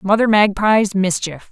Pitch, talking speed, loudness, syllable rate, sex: 200 Hz, 120 wpm, -15 LUFS, 4.3 syllables/s, female